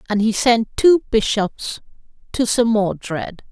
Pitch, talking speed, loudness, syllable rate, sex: 220 Hz, 135 wpm, -18 LUFS, 3.6 syllables/s, female